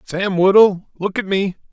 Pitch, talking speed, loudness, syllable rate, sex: 190 Hz, 175 wpm, -16 LUFS, 4.3 syllables/s, male